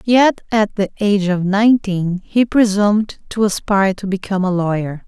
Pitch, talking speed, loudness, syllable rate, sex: 200 Hz, 165 wpm, -16 LUFS, 5.1 syllables/s, female